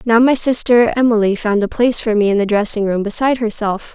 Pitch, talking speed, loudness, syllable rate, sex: 220 Hz, 230 wpm, -15 LUFS, 6.0 syllables/s, female